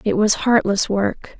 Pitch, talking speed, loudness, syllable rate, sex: 210 Hz, 175 wpm, -18 LUFS, 3.9 syllables/s, female